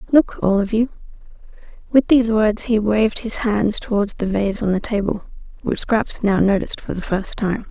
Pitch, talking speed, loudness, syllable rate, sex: 210 Hz, 195 wpm, -19 LUFS, 5.1 syllables/s, female